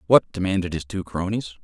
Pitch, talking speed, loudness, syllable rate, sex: 95 Hz, 185 wpm, -24 LUFS, 6.3 syllables/s, male